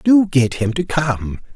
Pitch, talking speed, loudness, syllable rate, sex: 140 Hz, 195 wpm, -17 LUFS, 3.8 syllables/s, male